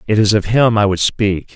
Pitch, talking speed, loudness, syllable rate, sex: 105 Hz, 270 wpm, -14 LUFS, 5.0 syllables/s, male